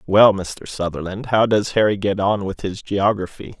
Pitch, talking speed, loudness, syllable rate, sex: 100 Hz, 185 wpm, -19 LUFS, 4.6 syllables/s, male